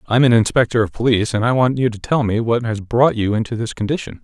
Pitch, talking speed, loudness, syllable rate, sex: 115 Hz, 270 wpm, -17 LUFS, 6.4 syllables/s, male